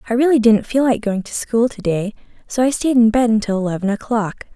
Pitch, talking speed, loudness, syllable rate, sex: 225 Hz, 235 wpm, -17 LUFS, 6.0 syllables/s, female